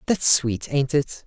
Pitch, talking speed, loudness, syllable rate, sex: 135 Hz, 190 wpm, -21 LUFS, 3.7 syllables/s, male